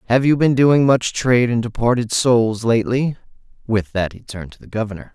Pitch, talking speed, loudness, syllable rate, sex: 120 Hz, 200 wpm, -17 LUFS, 5.6 syllables/s, male